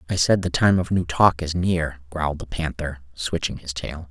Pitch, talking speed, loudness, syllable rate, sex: 80 Hz, 220 wpm, -23 LUFS, 4.9 syllables/s, male